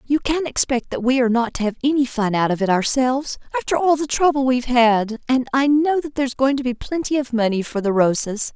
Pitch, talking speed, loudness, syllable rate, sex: 255 Hz, 250 wpm, -19 LUFS, 6.0 syllables/s, female